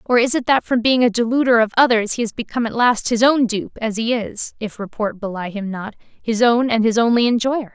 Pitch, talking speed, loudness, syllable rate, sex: 230 Hz, 250 wpm, -18 LUFS, 5.5 syllables/s, female